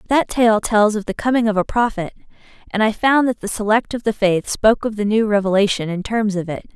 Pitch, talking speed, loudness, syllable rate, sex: 215 Hz, 240 wpm, -18 LUFS, 5.8 syllables/s, female